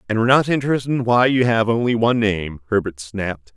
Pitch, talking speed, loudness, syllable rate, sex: 115 Hz, 220 wpm, -18 LUFS, 6.4 syllables/s, male